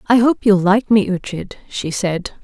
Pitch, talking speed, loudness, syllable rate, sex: 200 Hz, 195 wpm, -16 LUFS, 4.2 syllables/s, female